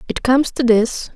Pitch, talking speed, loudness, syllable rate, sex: 245 Hz, 205 wpm, -16 LUFS, 5.3 syllables/s, female